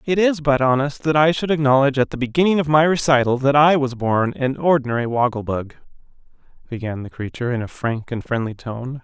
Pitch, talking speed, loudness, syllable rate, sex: 135 Hz, 205 wpm, -19 LUFS, 5.9 syllables/s, male